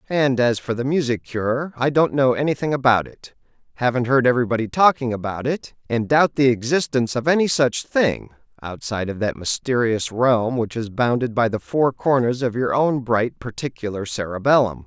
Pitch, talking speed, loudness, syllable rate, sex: 125 Hz, 180 wpm, -20 LUFS, 5.2 syllables/s, male